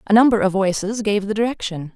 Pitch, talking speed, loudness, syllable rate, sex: 205 Hz, 215 wpm, -19 LUFS, 6.0 syllables/s, female